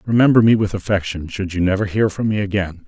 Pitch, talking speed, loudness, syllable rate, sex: 100 Hz, 230 wpm, -18 LUFS, 6.2 syllables/s, male